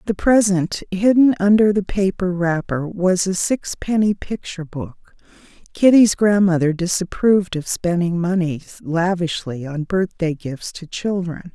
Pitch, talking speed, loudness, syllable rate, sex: 185 Hz, 125 wpm, -19 LUFS, 4.4 syllables/s, female